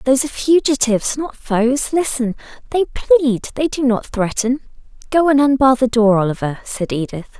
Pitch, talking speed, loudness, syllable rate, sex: 250 Hz, 120 wpm, -17 LUFS, 4.9 syllables/s, female